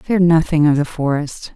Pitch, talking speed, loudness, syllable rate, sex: 155 Hz, 195 wpm, -16 LUFS, 4.6 syllables/s, female